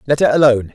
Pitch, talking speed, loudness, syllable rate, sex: 130 Hz, 240 wpm, -13 LUFS, 8.2 syllables/s, male